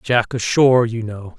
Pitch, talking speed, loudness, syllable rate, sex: 115 Hz, 175 wpm, -17 LUFS, 4.7 syllables/s, male